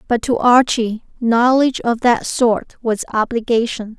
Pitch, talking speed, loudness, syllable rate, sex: 235 Hz, 135 wpm, -16 LUFS, 4.1 syllables/s, female